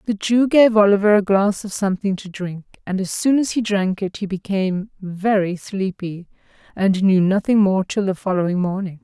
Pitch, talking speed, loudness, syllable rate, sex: 195 Hz, 195 wpm, -19 LUFS, 5.1 syllables/s, female